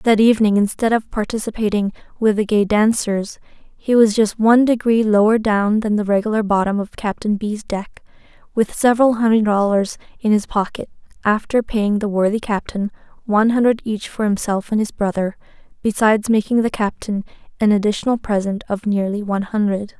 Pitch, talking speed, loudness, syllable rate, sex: 215 Hz, 165 wpm, -18 LUFS, 5.4 syllables/s, female